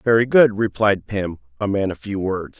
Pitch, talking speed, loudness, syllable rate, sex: 105 Hz, 210 wpm, -20 LUFS, 4.7 syllables/s, male